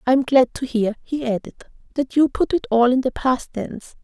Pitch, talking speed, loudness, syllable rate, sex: 255 Hz, 225 wpm, -20 LUFS, 5.1 syllables/s, female